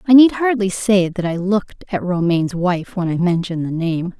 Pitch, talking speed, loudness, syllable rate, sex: 185 Hz, 215 wpm, -18 LUFS, 5.4 syllables/s, female